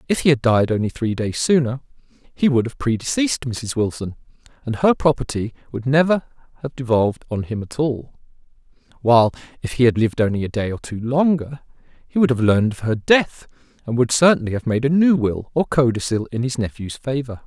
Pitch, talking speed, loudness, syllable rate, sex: 125 Hz, 195 wpm, -19 LUFS, 5.8 syllables/s, male